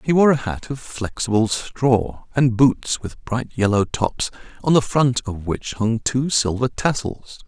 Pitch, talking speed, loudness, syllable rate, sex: 120 Hz, 175 wpm, -20 LUFS, 3.9 syllables/s, male